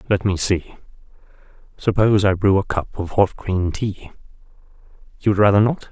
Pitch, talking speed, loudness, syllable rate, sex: 100 Hz, 150 wpm, -19 LUFS, 5.0 syllables/s, male